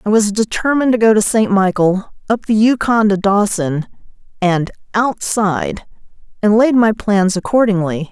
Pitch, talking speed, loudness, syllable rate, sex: 210 Hz, 150 wpm, -15 LUFS, 4.8 syllables/s, female